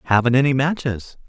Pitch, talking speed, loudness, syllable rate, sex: 130 Hz, 140 wpm, -19 LUFS, 6.0 syllables/s, male